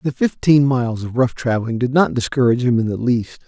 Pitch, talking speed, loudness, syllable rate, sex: 120 Hz, 225 wpm, -18 LUFS, 6.0 syllables/s, male